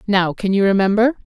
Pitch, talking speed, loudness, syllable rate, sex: 205 Hz, 175 wpm, -17 LUFS, 5.6 syllables/s, female